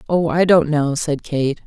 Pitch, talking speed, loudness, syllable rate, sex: 155 Hz, 215 wpm, -17 LUFS, 4.1 syllables/s, female